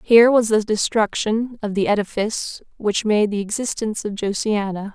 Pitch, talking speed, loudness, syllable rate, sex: 215 Hz, 160 wpm, -20 LUFS, 5.1 syllables/s, female